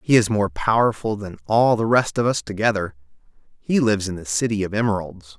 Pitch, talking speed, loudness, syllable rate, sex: 105 Hz, 200 wpm, -21 LUFS, 5.7 syllables/s, male